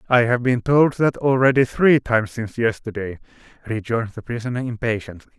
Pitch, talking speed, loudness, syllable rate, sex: 120 Hz, 155 wpm, -20 LUFS, 5.8 syllables/s, male